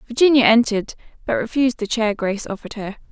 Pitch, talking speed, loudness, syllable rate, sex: 230 Hz, 175 wpm, -19 LUFS, 7.1 syllables/s, female